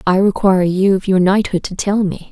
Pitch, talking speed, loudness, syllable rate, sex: 190 Hz, 235 wpm, -15 LUFS, 5.5 syllables/s, female